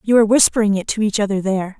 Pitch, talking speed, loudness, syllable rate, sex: 210 Hz, 265 wpm, -16 LUFS, 7.7 syllables/s, female